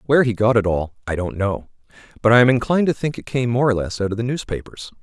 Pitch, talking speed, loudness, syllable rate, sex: 115 Hz, 275 wpm, -19 LUFS, 6.7 syllables/s, male